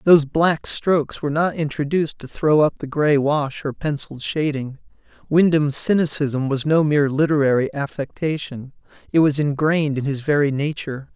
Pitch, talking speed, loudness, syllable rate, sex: 145 Hz, 155 wpm, -20 LUFS, 5.3 syllables/s, male